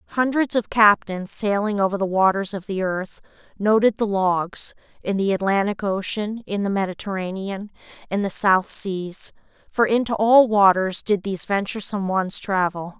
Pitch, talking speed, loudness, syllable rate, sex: 200 Hz, 150 wpm, -21 LUFS, 4.8 syllables/s, female